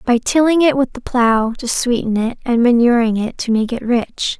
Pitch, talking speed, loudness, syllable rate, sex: 240 Hz, 220 wpm, -16 LUFS, 4.8 syllables/s, female